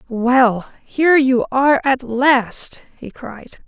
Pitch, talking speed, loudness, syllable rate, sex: 250 Hz, 130 wpm, -15 LUFS, 3.2 syllables/s, female